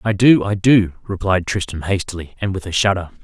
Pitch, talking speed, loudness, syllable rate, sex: 95 Hz, 185 wpm, -18 LUFS, 5.6 syllables/s, male